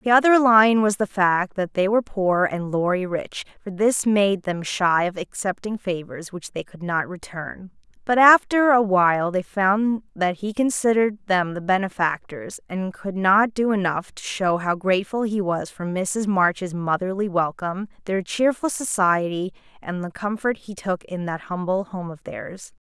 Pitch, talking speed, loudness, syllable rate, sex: 195 Hz, 180 wpm, -22 LUFS, 4.5 syllables/s, female